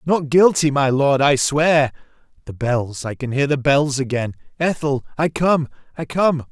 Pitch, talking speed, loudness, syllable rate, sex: 140 Hz, 175 wpm, -18 LUFS, 4.3 syllables/s, male